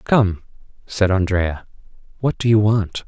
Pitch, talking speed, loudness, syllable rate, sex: 100 Hz, 135 wpm, -19 LUFS, 4.0 syllables/s, male